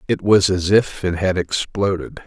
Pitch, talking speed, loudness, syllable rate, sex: 95 Hz, 185 wpm, -18 LUFS, 4.3 syllables/s, male